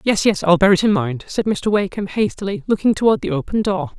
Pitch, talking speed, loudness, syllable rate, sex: 215 Hz, 240 wpm, -18 LUFS, 5.8 syllables/s, female